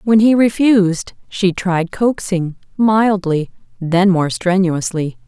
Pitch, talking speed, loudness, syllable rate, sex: 190 Hz, 115 wpm, -15 LUFS, 3.8 syllables/s, female